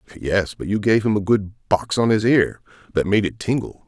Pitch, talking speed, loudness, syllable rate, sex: 105 Hz, 230 wpm, -20 LUFS, 5.4 syllables/s, male